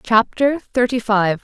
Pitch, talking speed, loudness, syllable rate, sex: 230 Hz, 125 wpm, -18 LUFS, 3.8 syllables/s, female